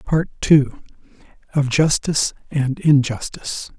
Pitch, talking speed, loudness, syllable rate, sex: 140 Hz, 95 wpm, -19 LUFS, 4.1 syllables/s, male